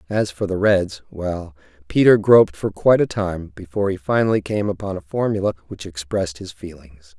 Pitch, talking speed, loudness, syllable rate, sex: 95 Hz, 175 wpm, -20 LUFS, 5.5 syllables/s, male